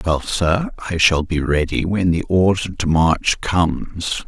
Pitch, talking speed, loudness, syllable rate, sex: 85 Hz, 170 wpm, -18 LUFS, 3.8 syllables/s, male